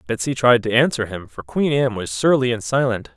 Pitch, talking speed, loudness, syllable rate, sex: 120 Hz, 230 wpm, -19 LUFS, 5.4 syllables/s, male